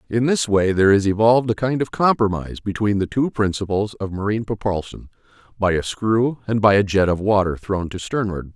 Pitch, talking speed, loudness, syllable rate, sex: 105 Hz, 205 wpm, -20 LUFS, 5.7 syllables/s, male